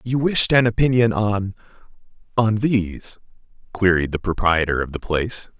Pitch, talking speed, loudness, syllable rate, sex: 105 Hz, 130 wpm, -20 LUFS, 4.9 syllables/s, male